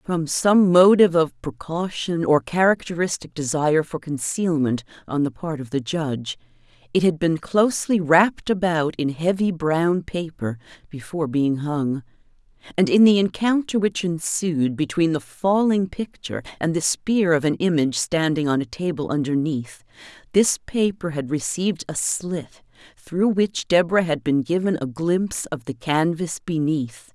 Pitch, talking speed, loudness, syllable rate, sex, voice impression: 165 Hz, 150 wpm, -21 LUFS, 4.6 syllables/s, female, feminine, middle-aged, tensed, slightly powerful, hard, clear, fluent, intellectual, calm, elegant, lively, slightly strict, slightly sharp